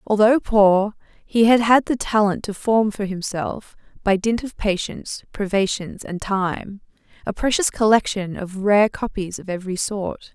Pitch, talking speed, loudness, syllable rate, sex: 205 Hz, 155 wpm, -20 LUFS, 4.3 syllables/s, female